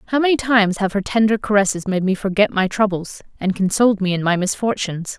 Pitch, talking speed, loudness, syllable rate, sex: 200 Hz, 210 wpm, -18 LUFS, 6.5 syllables/s, female